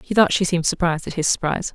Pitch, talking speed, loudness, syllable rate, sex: 175 Hz, 275 wpm, -20 LUFS, 7.9 syllables/s, female